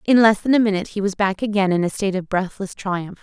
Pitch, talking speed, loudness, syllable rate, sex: 200 Hz, 280 wpm, -20 LUFS, 6.4 syllables/s, female